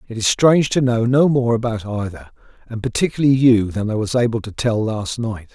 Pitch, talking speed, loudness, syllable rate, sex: 115 Hz, 215 wpm, -18 LUFS, 5.6 syllables/s, male